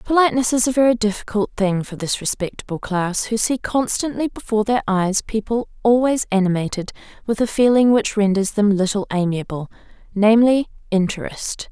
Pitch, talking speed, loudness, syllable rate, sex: 215 Hz, 150 wpm, -19 LUFS, 5.4 syllables/s, female